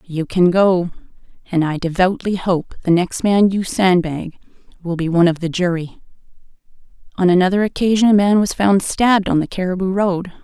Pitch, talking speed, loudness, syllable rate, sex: 185 Hz, 170 wpm, -17 LUFS, 5.3 syllables/s, female